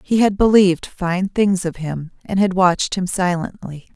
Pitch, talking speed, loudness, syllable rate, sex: 185 Hz, 180 wpm, -18 LUFS, 4.6 syllables/s, female